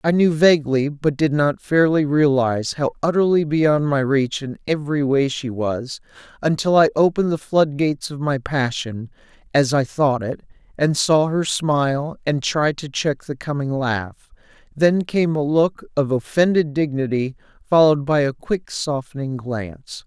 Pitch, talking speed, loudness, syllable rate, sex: 145 Hz, 160 wpm, -20 LUFS, 4.5 syllables/s, male